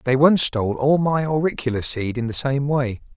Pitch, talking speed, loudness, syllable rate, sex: 135 Hz, 210 wpm, -20 LUFS, 5.1 syllables/s, male